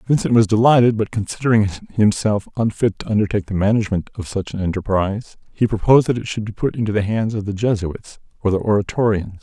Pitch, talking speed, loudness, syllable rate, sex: 105 Hz, 195 wpm, -19 LUFS, 6.2 syllables/s, male